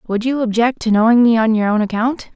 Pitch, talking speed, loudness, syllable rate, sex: 230 Hz, 255 wpm, -15 LUFS, 5.7 syllables/s, female